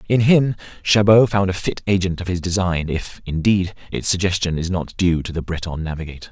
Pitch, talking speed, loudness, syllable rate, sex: 90 Hz, 200 wpm, -19 LUFS, 5.5 syllables/s, male